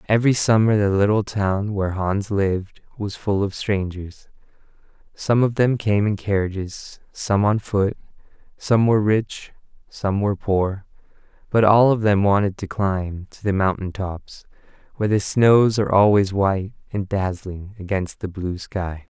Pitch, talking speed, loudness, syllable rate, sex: 100 Hz, 155 wpm, -20 LUFS, 4.5 syllables/s, male